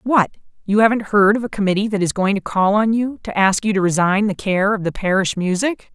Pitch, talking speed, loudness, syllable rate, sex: 205 Hz, 250 wpm, -18 LUFS, 5.7 syllables/s, female